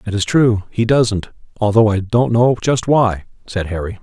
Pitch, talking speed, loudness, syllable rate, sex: 110 Hz, 195 wpm, -16 LUFS, 4.6 syllables/s, male